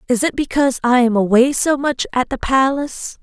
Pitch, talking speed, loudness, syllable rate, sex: 255 Hz, 205 wpm, -16 LUFS, 5.4 syllables/s, female